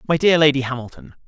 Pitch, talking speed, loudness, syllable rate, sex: 145 Hz, 190 wpm, -17 LUFS, 6.9 syllables/s, male